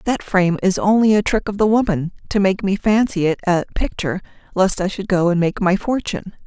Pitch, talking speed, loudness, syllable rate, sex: 195 Hz, 225 wpm, -18 LUFS, 5.8 syllables/s, female